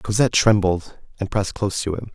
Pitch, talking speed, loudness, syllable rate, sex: 100 Hz, 195 wpm, -21 LUFS, 6.4 syllables/s, male